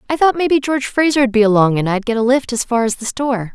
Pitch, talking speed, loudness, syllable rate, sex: 245 Hz, 290 wpm, -16 LUFS, 6.5 syllables/s, female